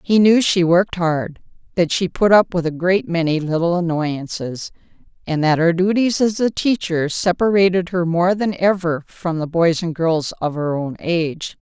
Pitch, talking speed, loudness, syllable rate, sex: 175 Hz, 185 wpm, -18 LUFS, 4.6 syllables/s, female